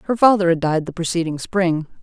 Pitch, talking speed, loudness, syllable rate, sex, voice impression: 175 Hz, 210 wpm, -19 LUFS, 5.8 syllables/s, female, feminine, slightly middle-aged, tensed, powerful, hard, clear, fluent, intellectual, calm, elegant, slightly lively, strict, sharp